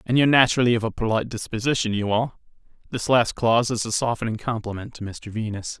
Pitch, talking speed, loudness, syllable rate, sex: 115 Hz, 195 wpm, -23 LUFS, 6.8 syllables/s, male